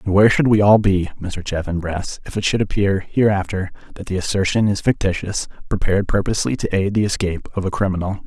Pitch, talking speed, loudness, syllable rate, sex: 95 Hz, 190 wpm, -19 LUFS, 6.2 syllables/s, male